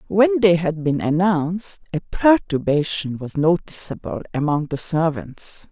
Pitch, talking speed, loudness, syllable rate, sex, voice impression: 170 Hz, 125 wpm, -20 LUFS, 4.3 syllables/s, female, feminine, middle-aged, slightly relaxed, slightly powerful, muffled, raspy, intellectual, calm, slightly friendly, reassuring, slightly strict